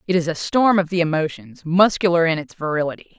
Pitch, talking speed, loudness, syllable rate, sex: 170 Hz, 205 wpm, -19 LUFS, 6.0 syllables/s, female